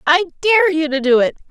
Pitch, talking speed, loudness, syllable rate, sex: 290 Hz, 240 wpm, -15 LUFS, 5.4 syllables/s, female